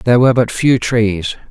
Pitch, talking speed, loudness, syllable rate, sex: 115 Hz, 200 wpm, -14 LUFS, 5.2 syllables/s, male